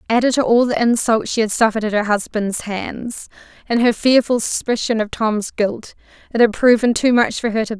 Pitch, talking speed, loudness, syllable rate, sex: 225 Hz, 215 wpm, -17 LUFS, 5.4 syllables/s, female